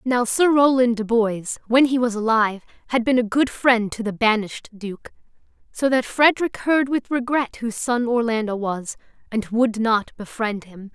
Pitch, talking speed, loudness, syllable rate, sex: 235 Hz, 180 wpm, -20 LUFS, 4.8 syllables/s, female